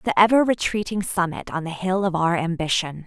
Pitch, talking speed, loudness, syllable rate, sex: 180 Hz, 195 wpm, -22 LUFS, 5.4 syllables/s, female